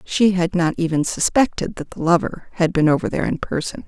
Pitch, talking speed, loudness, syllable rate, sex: 170 Hz, 215 wpm, -20 LUFS, 5.7 syllables/s, female